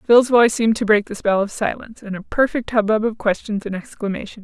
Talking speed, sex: 245 wpm, female